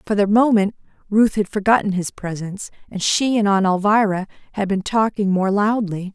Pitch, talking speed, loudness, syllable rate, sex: 205 Hz, 175 wpm, -19 LUFS, 5.2 syllables/s, female